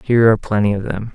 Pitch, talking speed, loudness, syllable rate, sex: 105 Hz, 260 wpm, -17 LUFS, 7.6 syllables/s, male